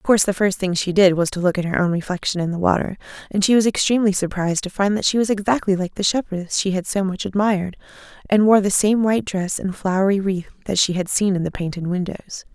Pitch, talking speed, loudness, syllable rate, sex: 195 Hz, 255 wpm, -19 LUFS, 6.4 syllables/s, female